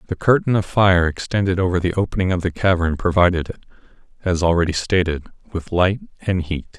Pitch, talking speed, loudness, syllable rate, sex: 90 Hz, 175 wpm, -19 LUFS, 5.8 syllables/s, male